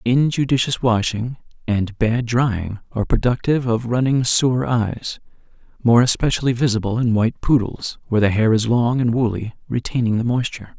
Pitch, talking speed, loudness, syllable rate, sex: 120 Hz, 150 wpm, -19 LUFS, 5.2 syllables/s, male